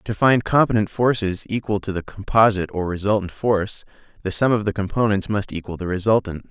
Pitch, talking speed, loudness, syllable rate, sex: 100 Hz, 185 wpm, -21 LUFS, 5.9 syllables/s, male